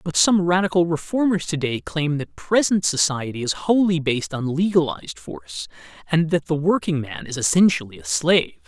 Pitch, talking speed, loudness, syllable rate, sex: 160 Hz, 165 wpm, -21 LUFS, 5.4 syllables/s, male